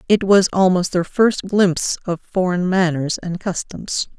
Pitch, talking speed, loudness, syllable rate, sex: 185 Hz, 160 wpm, -18 LUFS, 4.3 syllables/s, female